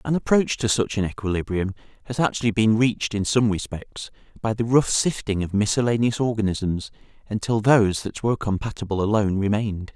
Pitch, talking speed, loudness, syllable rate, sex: 110 Hz, 165 wpm, -22 LUFS, 5.8 syllables/s, male